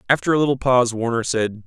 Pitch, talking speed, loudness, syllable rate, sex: 120 Hz, 215 wpm, -19 LUFS, 6.8 syllables/s, male